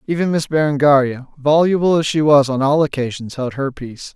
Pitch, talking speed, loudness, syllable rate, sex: 145 Hz, 190 wpm, -16 LUFS, 5.7 syllables/s, male